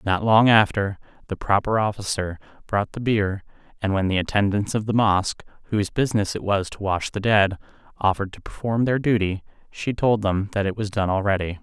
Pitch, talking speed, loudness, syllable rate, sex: 100 Hz, 190 wpm, -22 LUFS, 5.4 syllables/s, male